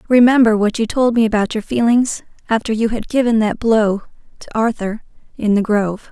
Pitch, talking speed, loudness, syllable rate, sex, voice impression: 220 Hz, 185 wpm, -16 LUFS, 5.4 syllables/s, female, feminine, adult-like, tensed, powerful, bright, clear, fluent, intellectual, friendly, elegant, lively, slightly sharp